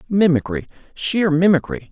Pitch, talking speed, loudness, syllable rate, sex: 160 Hz, 95 wpm, -18 LUFS, 4.8 syllables/s, male